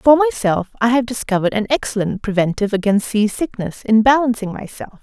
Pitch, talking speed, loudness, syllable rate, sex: 225 Hz, 165 wpm, -17 LUFS, 5.8 syllables/s, female